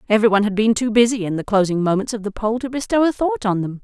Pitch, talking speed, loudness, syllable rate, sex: 220 Hz, 295 wpm, -19 LUFS, 7.1 syllables/s, female